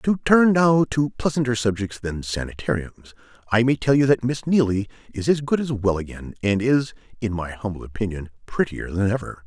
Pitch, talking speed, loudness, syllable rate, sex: 115 Hz, 190 wpm, -22 LUFS, 5.2 syllables/s, male